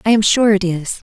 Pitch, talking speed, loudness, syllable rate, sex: 205 Hz, 270 wpm, -15 LUFS, 5.4 syllables/s, female